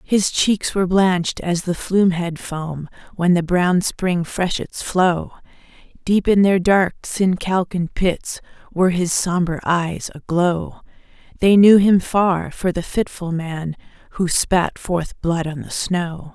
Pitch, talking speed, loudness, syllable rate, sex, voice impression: 180 Hz, 155 wpm, -19 LUFS, 3.7 syllables/s, female, feminine, adult-like, slightly thick, tensed, slightly hard, slightly muffled, slightly intellectual, friendly, reassuring, elegant, slightly lively